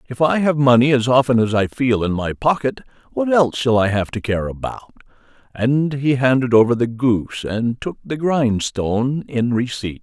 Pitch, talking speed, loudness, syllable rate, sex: 125 Hz, 190 wpm, -18 LUFS, 5.0 syllables/s, male